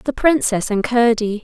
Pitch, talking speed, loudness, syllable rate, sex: 235 Hz, 165 wpm, -17 LUFS, 4.3 syllables/s, female